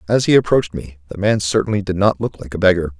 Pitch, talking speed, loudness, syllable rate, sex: 95 Hz, 260 wpm, -17 LUFS, 6.7 syllables/s, male